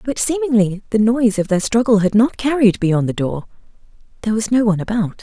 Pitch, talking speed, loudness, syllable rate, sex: 220 Hz, 205 wpm, -17 LUFS, 6.1 syllables/s, female